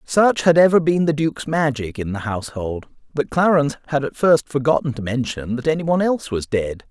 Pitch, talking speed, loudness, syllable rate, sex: 140 Hz, 210 wpm, -19 LUFS, 5.8 syllables/s, male